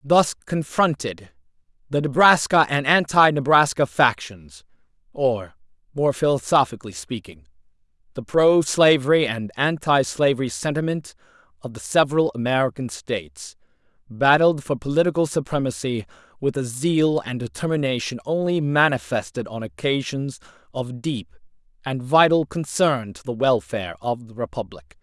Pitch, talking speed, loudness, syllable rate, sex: 135 Hz, 115 wpm, -21 LUFS, 4.8 syllables/s, male